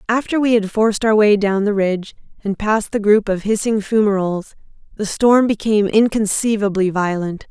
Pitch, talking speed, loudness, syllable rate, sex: 210 Hz, 170 wpm, -17 LUFS, 5.3 syllables/s, female